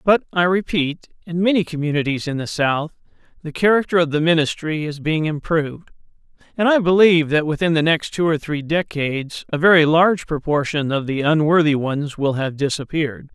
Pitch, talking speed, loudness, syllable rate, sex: 160 Hz, 175 wpm, -19 LUFS, 5.5 syllables/s, male